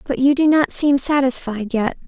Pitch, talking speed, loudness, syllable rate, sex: 265 Hz, 200 wpm, -17 LUFS, 4.8 syllables/s, female